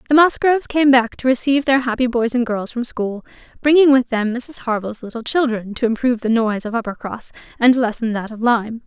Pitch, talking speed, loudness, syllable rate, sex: 240 Hz, 210 wpm, -18 LUFS, 6.0 syllables/s, female